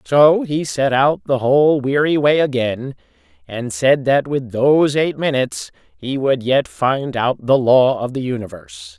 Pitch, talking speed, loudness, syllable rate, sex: 130 Hz, 175 wpm, -17 LUFS, 4.3 syllables/s, male